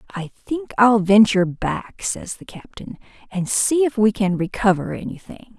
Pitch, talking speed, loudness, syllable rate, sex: 210 Hz, 160 wpm, -19 LUFS, 4.6 syllables/s, female